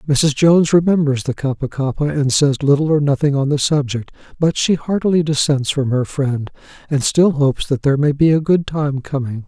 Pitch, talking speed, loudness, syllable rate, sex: 145 Hz, 205 wpm, -16 LUFS, 5.4 syllables/s, male